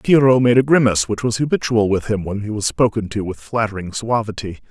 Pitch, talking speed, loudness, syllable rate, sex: 110 Hz, 215 wpm, -18 LUFS, 6.2 syllables/s, male